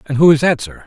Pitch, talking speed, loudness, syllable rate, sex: 145 Hz, 345 wpm, -14 LUFS, 6.7 syllables/s, male